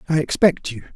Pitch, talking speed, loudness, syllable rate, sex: 155 Hz, 190 wpm, -18 LUFS, 5.9 syllables/s, male